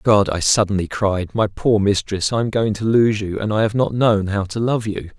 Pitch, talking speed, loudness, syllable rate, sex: 105 Hz, 255 wpm, -18 LUFS, 4.9 syllables/s, male